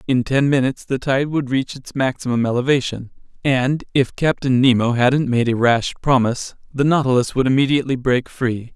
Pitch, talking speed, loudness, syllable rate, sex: 130 Hz, 170 wpm, -18 LUFS, 5.3 syllables/s, male